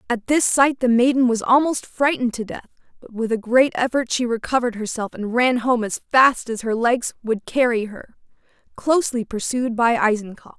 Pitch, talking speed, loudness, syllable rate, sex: 240 Hz, 185 wpm, -20 LUFS, 5.1 syllables/s, female